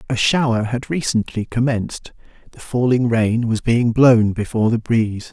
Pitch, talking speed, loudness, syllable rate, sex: 115 Hz, 145 wpm, -18 LUFS, 4.8 syllables/s, male